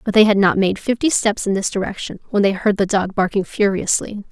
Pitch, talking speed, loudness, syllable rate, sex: 200 Hz, 235 wpm, -18 LUFS, 5.7 syllables/s, female